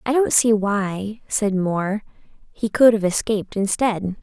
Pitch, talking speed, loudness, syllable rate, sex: 210 Hz, 155 wpm, -20 LUFS, 4.2 syllables/s, female